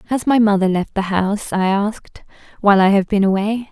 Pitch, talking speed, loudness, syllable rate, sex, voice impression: 205 Hz, 210 wpm, -17 LUFS, 5.8 syllables/s, female, very feminine, slightly adult-like, slightly soft, slightly calm, elegant, slightly sweet